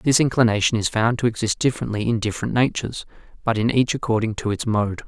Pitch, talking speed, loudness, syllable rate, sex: 115 Hz, 200 wpm, -21 LUFS, 6.5 syllables/s, male